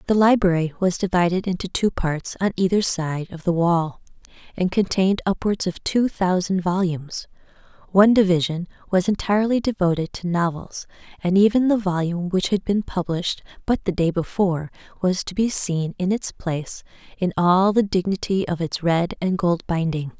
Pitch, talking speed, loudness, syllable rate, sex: 185 Hz, 165 wpm, -21 LUFS, 5.2 syllables/s, female